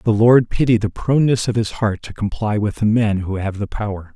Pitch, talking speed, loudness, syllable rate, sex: 110 Hz, 245 wpm, -18 LUFS, 5.5 syllables/s, male